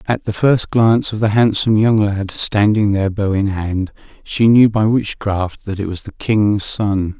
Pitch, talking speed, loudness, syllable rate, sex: 105 Hz, 200 wpm, -16 LUFS, 4.4 syllables/s, male